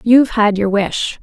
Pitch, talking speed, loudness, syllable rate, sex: 215 Hz, 195 wpm, -14 LUFS, 4.4 syllables/s, female